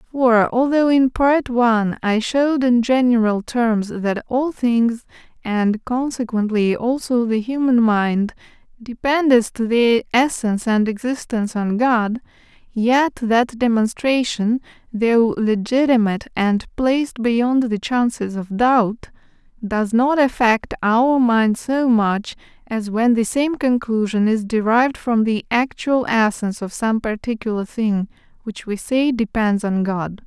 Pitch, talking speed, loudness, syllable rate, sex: 235 Hz, 135 wpm, -18 LUFS, 3.7 syllables/s, female